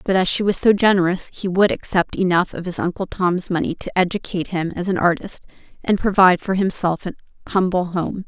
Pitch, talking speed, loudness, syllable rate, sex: 185 Hz, 205 wpm, -19 LUFS, 5.8 syllables/s, female